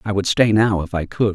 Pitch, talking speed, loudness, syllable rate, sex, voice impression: 100 Hz, 310 wpm, -18 LUFS, 5.4 syllables/s, male, masculine, adult-like, slightly thick, slightly sincere, slightly calm, kind